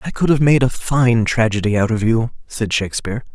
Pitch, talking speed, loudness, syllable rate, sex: 115 Hz, 215 wpm, -17 LUFS, 5.6 syllables/s, male